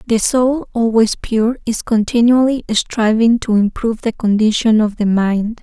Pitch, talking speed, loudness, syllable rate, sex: 225 Hz, 150 wpm, -15 LUFS, 4.4 syllables/s, female